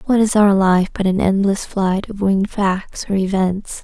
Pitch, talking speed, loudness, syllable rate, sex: 195 Hz, 205 wpm, -17 LUFS, 4.4 syllables/s, female